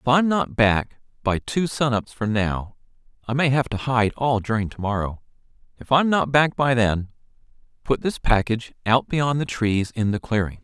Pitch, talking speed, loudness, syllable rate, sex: 120 Hz, 175 wpm, -22 LUFS, 4.8 syllables/s, male